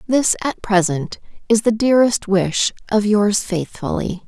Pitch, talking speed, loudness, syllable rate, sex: 210 Hz, 140 wpm, -18 LUFS, 4.1 syllables/s, female